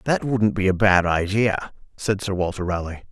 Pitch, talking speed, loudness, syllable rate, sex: 100 Hz, 195 wpm, -21 LUFS, 4.9 syllables/s, male